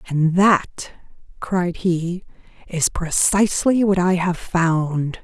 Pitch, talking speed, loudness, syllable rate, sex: 180 Hz, 115 wpm, -19 LUFS, 3.2 syllables/s, female